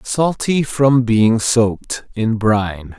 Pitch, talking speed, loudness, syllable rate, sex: 115 Hz, 120 wpm, -16 LUFS, 3.2 syllables/s, male